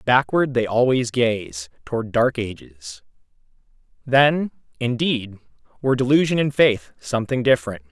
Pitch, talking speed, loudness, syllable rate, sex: 120 Hz, 115 wpm, -20 LUFS, 4.7 syllables/s, male